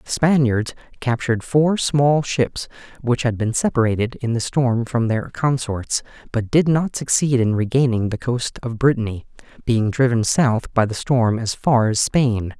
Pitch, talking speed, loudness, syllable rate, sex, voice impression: 125 Hz, 170 wpm, -19 LUFS, 4.4 syllables/s, male, masculine, adult-like, slightly relaxed, slightly weak, bright, soft, slightly muffled, intellectual, calm, friendly, slightly lively, kind, modest